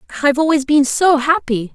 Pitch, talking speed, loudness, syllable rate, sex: 280 Hz, 170 wpm, -15 LUFS, 6.3 syllables/s, female